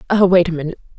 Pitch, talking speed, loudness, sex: 175 Hz, 245 wpm, -15 LUFS, female